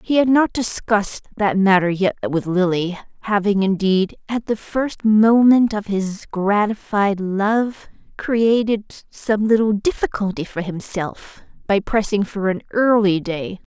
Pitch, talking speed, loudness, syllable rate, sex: 205 Hz, 135 wpm, -19 LUFS, 3.9 syllables/s, female